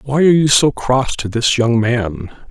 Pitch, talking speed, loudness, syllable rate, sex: 125 Hz, 215 wpm, -14 LUFS, 4.4 syllables/s, male